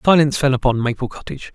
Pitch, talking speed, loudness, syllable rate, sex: 135 Hz, 195 wpm, -18 LUFS, 7.6 syllables/s, male